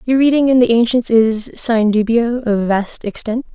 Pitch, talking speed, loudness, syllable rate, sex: 230 Hz, 185 wpm, -15 LUFS, 4.5 syllables/s, female